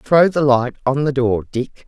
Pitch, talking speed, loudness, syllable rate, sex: 135 Hz, 225 wpm, -17 LUFS, 4.2 syllables/s, female